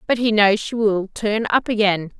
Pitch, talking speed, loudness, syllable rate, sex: 210 Hz, 220 wpm, -19 LUFS, 4.6 syllables/s, female